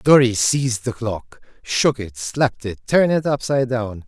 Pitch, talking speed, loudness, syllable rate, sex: 120 Hz, 145 wpm, -19 LUFS, 4.8 syllables/s, male